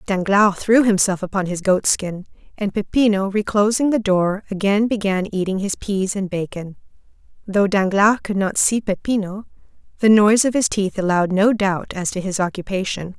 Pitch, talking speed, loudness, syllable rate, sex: 200 Hz, 170 wpm, -19 LUFS, 5.1 syllables/s, female